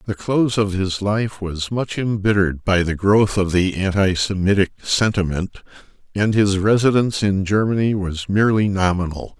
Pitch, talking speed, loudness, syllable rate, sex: 100 Hz, 145 wpm, -19 LUFS, 4.9 syllables/s, male